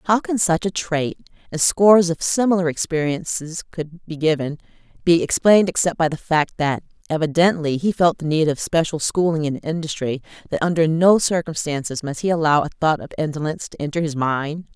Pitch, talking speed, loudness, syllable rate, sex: 160 Hz, 170 wpm, -20 LUFS, 5.6 syllables/s, female